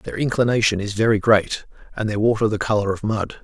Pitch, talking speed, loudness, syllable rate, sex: 110 Hz, 210 wpm, -20 LUFS, 5.9 syllables/s, male